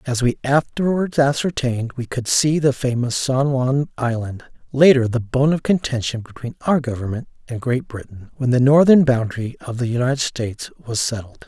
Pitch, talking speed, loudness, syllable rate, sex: 130 Hz, 175 wpm, -19 LUFS, 5.3 syllables/s, male